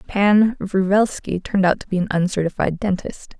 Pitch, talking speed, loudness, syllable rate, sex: 195 Hz, 160 wpm, -19 LUFS, 5.7 syllables/s, female